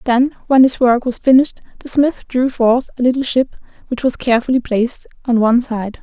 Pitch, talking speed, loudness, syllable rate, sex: 250 Hz, 200 wpm, -15 LUFS, 5.7 syllables/s, female